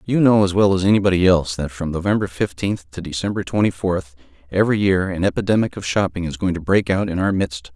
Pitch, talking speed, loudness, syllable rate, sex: 90 Hz, 225 wpm, -19 LUFS, 6.2 syllables/s, male